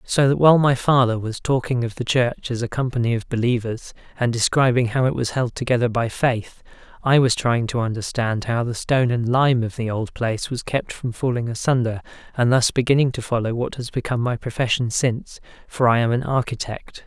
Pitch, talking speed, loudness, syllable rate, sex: 120 Hz, 205 wpm, -21 LUFS, 5.5 syllables/s, male